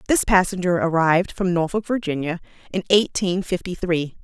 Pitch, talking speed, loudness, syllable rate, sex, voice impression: 180 Hz, 140 wpm, -21 LUFS, 5.4 syllables/s, female, feminine, adult-like, clear, slightly fluent, slightly refreshing, sincere